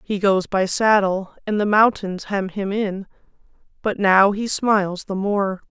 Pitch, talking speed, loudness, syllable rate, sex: 200 Hz, 170 wpm, -20 LUFS, 4.1 syllables/s, female